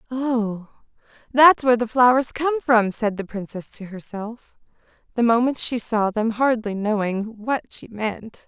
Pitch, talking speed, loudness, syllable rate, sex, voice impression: 230 Hz, 155 wpm, -21 LUFS, 4.2 syllables/s, female, feminine, adult-like, sincere, slightly calm, slightly friendly, slightly kind